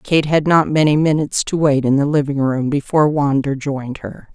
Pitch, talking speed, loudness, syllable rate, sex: 145 Hz, 205 wpm, -16 LUFS, 5.3 syllables/s, female